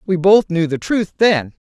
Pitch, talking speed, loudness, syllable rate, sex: 180 Hz, 215 wpm, -16 LUFS, 4.4 syllables/s, female